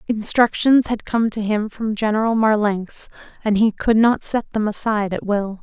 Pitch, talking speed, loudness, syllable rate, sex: 215 Hz, 180 wpm, -19 LUFS, 4.7 syllables/s, female